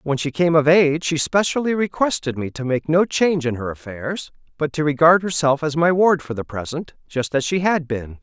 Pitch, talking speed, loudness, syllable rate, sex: 155 Hz, 225 wpm, -19 LUFS, 5.3 syllables/s, male